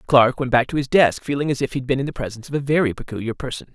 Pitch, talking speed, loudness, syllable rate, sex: 130 Hz, 320 wpm, -21 LUFS, 7.5 syllables/s, male